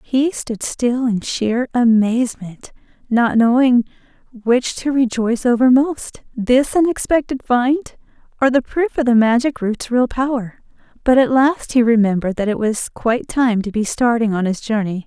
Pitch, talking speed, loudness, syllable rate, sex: 240 Hz, 160 wpm, -17 LUFS, 4.5 syllables/s, female